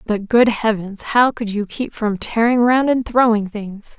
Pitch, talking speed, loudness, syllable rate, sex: 225 Hz, 195 wpm, -17 LUFS, 4.1 syllables/s, female